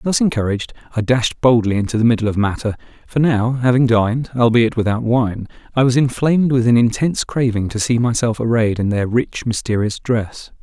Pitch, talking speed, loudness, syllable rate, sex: 120 Hz, 185 wpm, -17 LUFS, 5.6 syllables/s, male